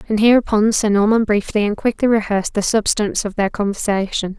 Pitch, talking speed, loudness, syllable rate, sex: 215 Hz, 180 wpm, -17 LUFS, 5.9 syllables/s, female